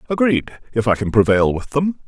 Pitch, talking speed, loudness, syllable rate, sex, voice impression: 125 Hz, 205 wpm, -18 LUFS, 5.6 syllables/s, male, masculine, adult-like, tensed, powerful, hard, clear, fluent, cool, slightly friendly, wild, lively, slightly strict, slightly intense